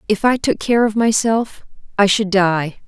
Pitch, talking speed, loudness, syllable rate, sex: 210 Hz, 190 wpm, -16 LUFS, 4.3 syllables/s, female